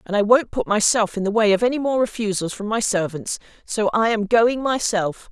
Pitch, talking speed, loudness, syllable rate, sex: 215 Hz, 225 wpm, -20 LUFS, 5.3 syllables/s, female